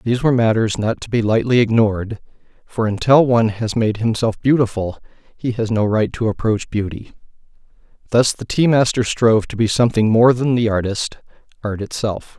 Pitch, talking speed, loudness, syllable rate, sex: 115 Hz, 170 wpm, -17 LUFS, 5.4 syllables/s, male